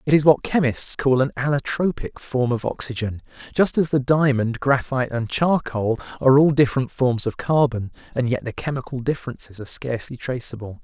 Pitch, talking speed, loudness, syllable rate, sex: 130 Hz, 170 wpm, -21 LUFS, 5.5 syllables/s, male